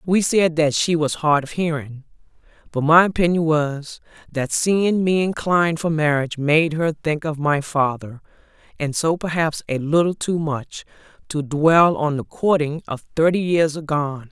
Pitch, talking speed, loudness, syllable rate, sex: 155 Hz, 170 wpm, -20 LUFS, 4.5 syllables/s, female